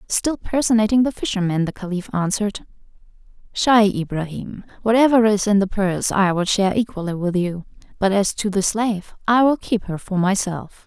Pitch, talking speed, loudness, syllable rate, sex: 205 Hz, 170 wpm, -19 LUFS, 5.3 syllables/s, female